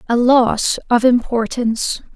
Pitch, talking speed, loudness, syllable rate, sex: 240 Hz, 110 wpm, -16 LUFS, 3.9 syllables/s, female